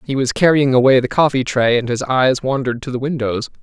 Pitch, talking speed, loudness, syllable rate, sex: 130 Hz, 230 wpm, -16 LUFS, 5.9 syllables/s, male